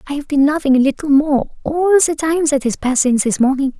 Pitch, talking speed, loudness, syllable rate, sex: 285 Hz, 255 wpm, -15 LUFS, 6.6 syllables/s, female